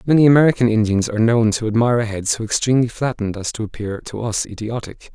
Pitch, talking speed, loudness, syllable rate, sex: 115 Hz, 210 wpm, -18 LUFS, 6.8 syllables/s, male